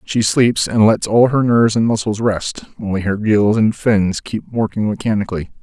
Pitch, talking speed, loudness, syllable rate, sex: 110 Hz, 190 wpm, -16 LUFS, 4.9 syllables/s, male